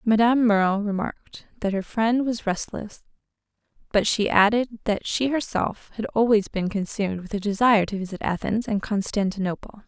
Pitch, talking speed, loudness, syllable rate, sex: 210 Hz, 160 wpm, -23 LUFS, 5.2 syllables/s, female